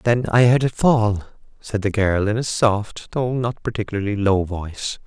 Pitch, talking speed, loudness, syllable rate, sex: 110 Hz, 190 wpm, -20 LUFS, 4.6 syllables/s, male